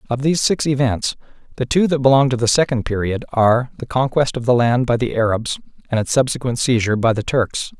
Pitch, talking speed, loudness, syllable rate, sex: 125 Hz, 215 wpm, -18 LUFS, 6.0 syllables/s, male